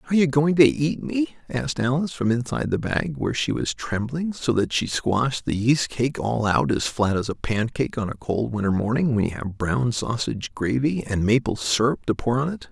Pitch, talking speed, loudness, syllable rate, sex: 125 Hz, 225 wpm, -23 LUFS, 5.5 syllables/s, male